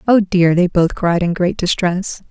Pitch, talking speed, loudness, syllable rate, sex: 180 Hz, 210 wpm, -16 LUFS, 4.3 syllables/s, female